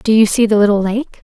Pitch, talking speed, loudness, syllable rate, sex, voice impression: 215 Hz, 275 wpm, -13 LUFS, 5.9 syllables/s, female, very feminine, slightly adult-like, very thin, very tensed, powerful, very bright, very hard, very clear, very fluent, slightly raspy, very cute, intellectual, very refreshing, slightly sincere, slightly calm, friendly, reassuring, unique, elegant, slightly wild, sweet, very lively, slightly strict, intense, slightly sharp, light